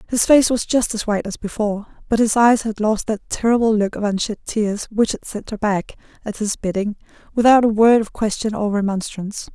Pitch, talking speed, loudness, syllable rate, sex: 215 Hz, 215 wpm, -19 LUFS, 5.6 syllables/s, female